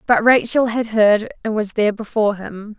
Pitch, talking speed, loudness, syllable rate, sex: 215 Hz, 195 wpm, -17 LUFS, 5.1 syllables/s, female